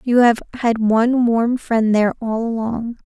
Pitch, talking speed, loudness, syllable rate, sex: 230 Hz, 175 wpm, -18 LUFS, 4.6 syllables/s, female